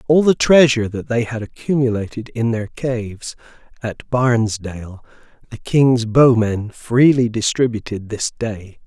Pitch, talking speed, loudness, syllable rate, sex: 115 Hz, 130 wpm, -17 LUFS, 4.4 syllables/s, male